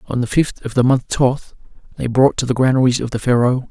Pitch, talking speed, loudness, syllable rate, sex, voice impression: 125 Hz, 245 wpm, -17 LUFS, 5.7 syllables/s, male, masculine, adult-like, slightly thick, slightly halting, slightly sincere, calm